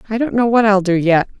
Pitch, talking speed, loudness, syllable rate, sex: 205 Hz, 300 wpm, -14 LUFS, 6.3 syllables/s, female